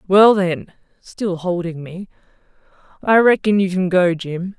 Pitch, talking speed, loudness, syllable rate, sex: 185 Hz, 120 wpm, -17 LUFS, 4.1 syllables/s, female